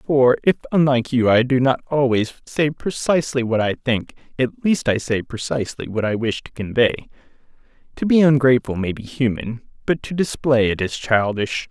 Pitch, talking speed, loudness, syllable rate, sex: 125 Hz, 180 wpm, -19 LUFS, 5.2 syllables/s, male